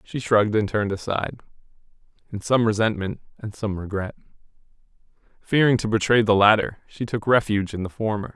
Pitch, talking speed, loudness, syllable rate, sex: 105 Hz, 160 wpm, -22 LUFS, 6.0 syllables/s, male